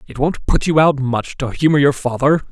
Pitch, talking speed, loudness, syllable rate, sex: 140 Hz, 240 wpm, -16 LUFS, 5.1 syllables/s, male